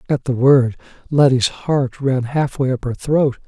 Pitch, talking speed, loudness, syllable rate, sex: 135 Hz, 175 wpm, -17 LUFS, 4.2 syllables/s, male